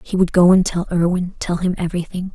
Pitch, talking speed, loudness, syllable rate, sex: 180 Hz, 205 wpm, -18 LUFS, 6.7 syllables/s, female